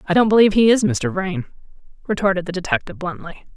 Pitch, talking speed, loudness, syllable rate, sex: 190 Hz, 185 wpm, -18 LUFS, 6.9 syllables/s, female